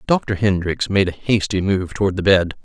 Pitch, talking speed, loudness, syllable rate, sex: 95 Hz, 205 wpm, -19 LUFS, 5.0 syllables/s, male